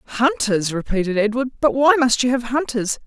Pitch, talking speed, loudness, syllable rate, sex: 230 Hz, 155 wpm, -19 LUFS, 5.6 syllables/s, female